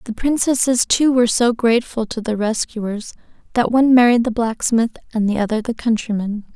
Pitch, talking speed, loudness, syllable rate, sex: 230 Hz, 175 wpm, -17 LUFS, 5.4 syllables/s, female